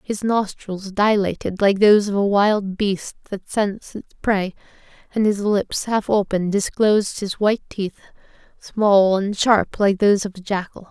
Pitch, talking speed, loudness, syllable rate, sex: 200 Hz, 165 wpm, -19 LUFS, 4.4 syllables/s, female